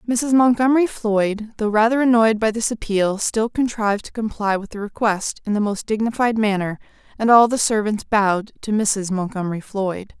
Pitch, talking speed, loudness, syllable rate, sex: 215 Hz, 175 wpm, -19 LUFS, 5.1 syllables/s, female